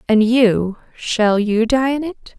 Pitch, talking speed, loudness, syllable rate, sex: 235 Hz, 150 wpm, -16 LUFS, 3.4 syllables/s, female